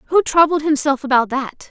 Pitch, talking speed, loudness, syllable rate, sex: 290 Hz, 175 wpm, -16 LUFS, 4.8 syllables/s, female